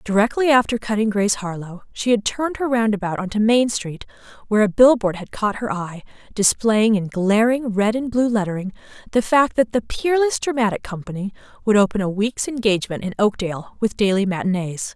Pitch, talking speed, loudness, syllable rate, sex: 215 Hz, 175 wpm, -20 LUFS, 5.7 syllables/s, female